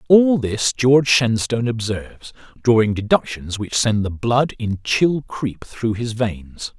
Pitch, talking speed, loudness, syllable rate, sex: 115 Hz, 150 wpm, -19 LUFS, 4.0 syllables/s, male